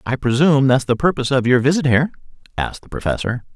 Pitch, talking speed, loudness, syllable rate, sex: 130 Hz, 200 wpm, -17 LUFS, 7.2 syllables/s, male